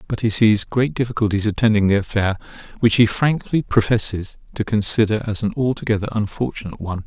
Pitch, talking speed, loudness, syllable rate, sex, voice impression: 110 Hz, 155 wpm, -19 LUFS, 6.1 syllables/s, male, very masculine, very middle-aged, very thick, tensed, very powerful, bright, soft, slightly muffled, fluent, slightly raspy, cool, very intellectual, slightly refreshing, sincere, very calm, very mature, friendly, reassuring, very unique, slightly elegant, very wild, lively, very kind, modest